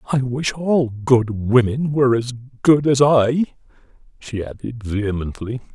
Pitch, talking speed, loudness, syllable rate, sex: 125 Hz, 135 wpm, -19 LUFS, 4.3 syllables/s, male